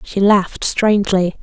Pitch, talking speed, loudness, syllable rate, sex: 195 Hz, 125 wpm, -15 LUFS, 4.6 syllables/s, female